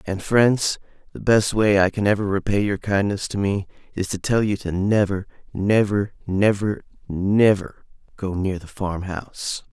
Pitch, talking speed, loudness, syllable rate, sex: 100 Hz, 165 wpm, -21 LUFS, 4.4 syllables/s, male